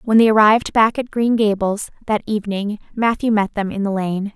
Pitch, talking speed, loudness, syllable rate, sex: 210 Hz, 205 wpm, -18 LUFS, 5.2 syllables/s, female